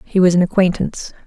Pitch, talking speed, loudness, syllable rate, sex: 180 Hz, 190 wpm, -16 LUFS, 6.6 syllables/s, female